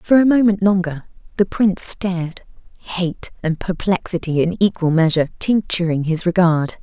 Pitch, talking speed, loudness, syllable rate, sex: 180 Hz, 140 wpm, -18 LUFS, 4.8 syllables/s, female